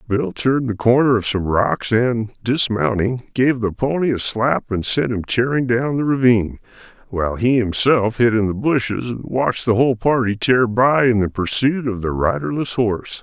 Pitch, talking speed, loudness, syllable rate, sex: 115 Hz, 190 wpm, -18 LUFS, 4.9 syllables/s, male